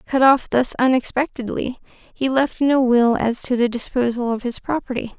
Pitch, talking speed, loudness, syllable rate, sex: 250 Hz, 175 wpm, -19 LUFS, 4.7 syllables/s, female